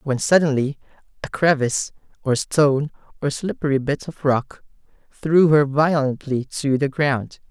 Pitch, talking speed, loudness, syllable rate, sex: 140 Hz, 135 wpm, -20 LUFS, 4.4 syllables/s, male